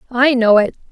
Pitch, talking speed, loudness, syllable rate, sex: 240 Hz, 195 wpm, -13 LUFS, 5.4 syllables/s, female